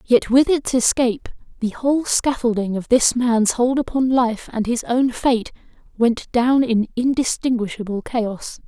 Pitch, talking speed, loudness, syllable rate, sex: 240 Hz, 150 wpm, -19 LUFS, 4.3 syllables/s, female